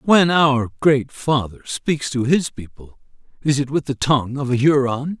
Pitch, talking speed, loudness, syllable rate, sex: 135 Hz, 185 wpm, -19 LUFS, 4.4 syllables/s, male